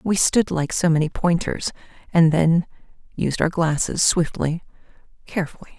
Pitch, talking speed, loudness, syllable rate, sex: 165 Hz, 135 wpm, -21 LUFS, 4.7 syllables/s, female